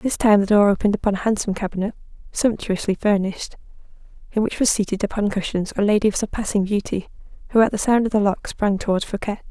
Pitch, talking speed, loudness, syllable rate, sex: 205 Hz, 200 wpm, -21 LUFS, 6.7 syllables/s, female